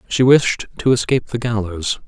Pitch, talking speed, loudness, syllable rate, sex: 115 Hz, 175 wpm, -17 LUFS, 5.0 syllables/s, male